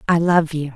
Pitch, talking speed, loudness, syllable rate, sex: 160 Hz, 240 wpm, -18 LUFS, 5.1 syllables/s, female